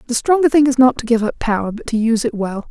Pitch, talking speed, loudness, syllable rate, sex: 240 Hz, 310 wpm, -16 LUFS, 6.8 syllables/s, female